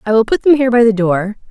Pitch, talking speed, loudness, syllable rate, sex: 225 Hz, 320 wpm, -13 LUFS, 7.0 syllables/s, female